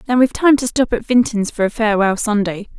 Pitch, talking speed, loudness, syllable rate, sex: 225 Hz, 235 wpm, -16 LUFS, 6.3 syllables/s, female